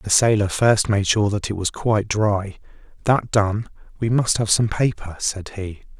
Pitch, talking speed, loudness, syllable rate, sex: 105 Hz, 190 wpm, -20 LUFS, 4.4 syllables/s, male